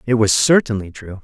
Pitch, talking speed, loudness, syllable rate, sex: 115 Hz, 195 wpm, -16 LUFS, 5.4 syllables/s, male